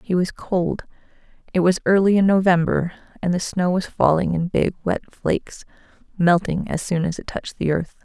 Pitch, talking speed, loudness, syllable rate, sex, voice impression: 180 Hz, 185 wpm, -21 LUFS, 5.2 syllables/s, female, very feminine, slightly young, slightly adult-like, very thin, relaxed, weak, dark, slightly hard, muffled, slightly halting, slightly raspy, very cute, very intellectual, refreshing, sincere, very calm, very friendly, very reassuring, unique, very elegant, slightly wild, very sweet, very kind, very modest, light